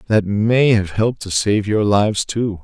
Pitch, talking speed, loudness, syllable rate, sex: 105 Hz, 205 wpm, -17 LUFS, 4.5 syllables/s, male